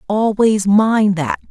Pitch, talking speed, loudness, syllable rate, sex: 205 Hz, 120 wpm, -15 LUFS, 3.2 syllables/s, female